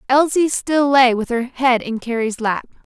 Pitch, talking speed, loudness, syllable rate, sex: 250 Hz, 185 wpm, -17 LUFS, 4.4 syllables/s, female